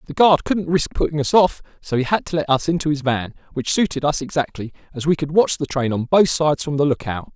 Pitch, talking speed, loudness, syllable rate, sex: 150 Hz, 270 wpm, -19 LUFS, 6.0 syllables/s, male